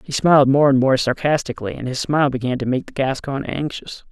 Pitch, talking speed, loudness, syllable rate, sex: 135 Hz, 220 wpm, -19 LUFS, 6.1 syllables/s, male